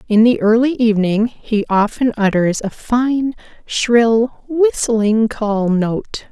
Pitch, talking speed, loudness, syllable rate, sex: 225 Hz, 125 wpm, -16 LUFS, 3.4 syllables/s, female